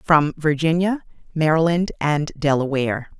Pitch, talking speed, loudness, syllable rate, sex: 155 Hz, 95 wpm, -20 LUFS, 4.5 syllables/s, female